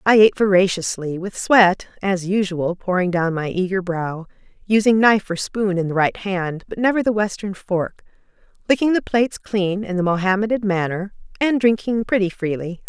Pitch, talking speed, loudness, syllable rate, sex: 195 Hz, 170 wpm, -19 LUFS, 5.1 syllables/s, female